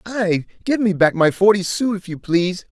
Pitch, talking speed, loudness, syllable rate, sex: 195 Hz, 215 wpm, -18 LUFS, 5.0 syllables/s, male